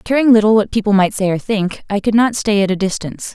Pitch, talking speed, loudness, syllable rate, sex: 205 Hz, 270 wpm, -15 LUFS, 6.1 syllables/s, female